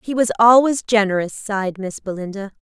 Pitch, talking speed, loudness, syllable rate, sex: 210 Hz, 160 wpm, -18 LUFS, 5.6 syllables/s, female